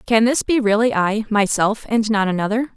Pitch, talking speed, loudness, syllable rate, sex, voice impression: 220 Hz, 195 wpm, -18 LUFS, 5.2 syllables/s, female, feminine, slightly adult-like, slightly fluent, cute, slightly kind